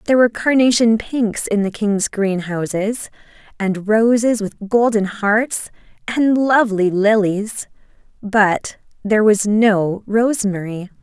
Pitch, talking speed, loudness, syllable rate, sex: 215 Hz, 115 wpm, -17 LUFS, 3.9 syllables/s, female